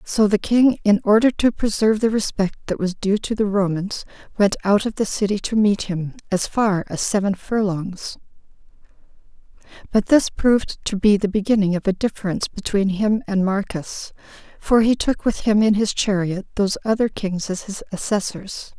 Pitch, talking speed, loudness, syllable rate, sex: 205 Hz, 180 wpm, -20 LUFS, 5.0 syllables/s, female